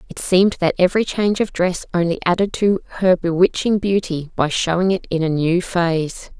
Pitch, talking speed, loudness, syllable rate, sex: 180 Hz, 190 wpm, -18 LUFS, 5.5 syllables/s, female